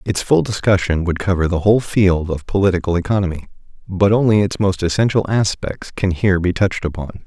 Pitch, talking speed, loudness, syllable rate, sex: 95 Hz, 180 wpm, -17 LUFS, 5.8 syllables/s, male